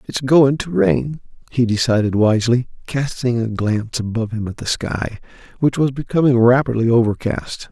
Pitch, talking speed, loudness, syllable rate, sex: 120 Hz, 155 wpm, -18 LUFS, 5.1 syllables/s, male